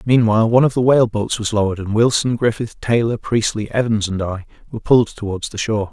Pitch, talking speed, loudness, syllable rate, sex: 110 Hz, 215 wpm, -17 LUFS, 6.3 syllables/s, male